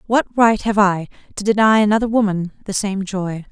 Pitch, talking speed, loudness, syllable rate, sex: 205 Hz, 190 wpm, -17 LUFS, 5.2 syllables/s, female